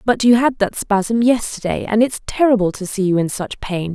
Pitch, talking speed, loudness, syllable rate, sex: 215 Hz, 245 wpm, -17 LUFS, 5.3 syllables/s, female